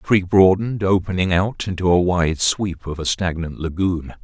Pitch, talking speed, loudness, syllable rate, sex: 90 Hz, 185 wpm, -19 LUFS, 4.8 syllables/s, male